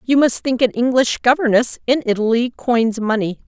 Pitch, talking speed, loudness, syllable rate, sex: 240 Hz, 175 wpm, -17 LUFS, 4.9 syllables/s, female